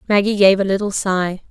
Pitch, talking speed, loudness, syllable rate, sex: 195 Hz, 200 wpm, -16 LUFS, 5.4 syllables/s, female